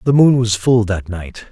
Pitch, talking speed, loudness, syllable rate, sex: 110 Hz, 235 wpm, -15 LUFS, 4.4 syllables/s, male